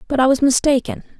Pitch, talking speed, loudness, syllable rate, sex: 270 Hz, 200 wpm, -16 LUFS, 6.6 syllables/s, female